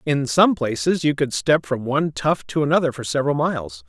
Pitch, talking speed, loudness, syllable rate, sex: 135 Hz, 215 wpm, -20 LUFS, 5.6 syllables/s, male